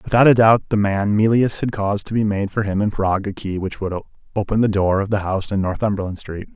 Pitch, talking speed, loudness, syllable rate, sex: 100 Hz, 255 wpm, -19 LUFS, 6.2 syllables/s, male